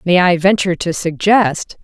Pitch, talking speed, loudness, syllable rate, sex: 180 Hz, 165 wpm, -14 LUFS, 4.7 syllables/s, female